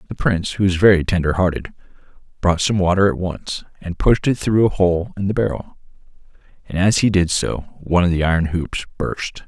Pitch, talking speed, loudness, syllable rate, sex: 90 Hz, 205 wpm, -18 LUFS, 5.5 syllables/s, male